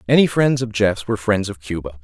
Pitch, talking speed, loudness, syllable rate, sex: 105 Hz, 235 wpm, -19 LUFS, 6.3 syllables/s, male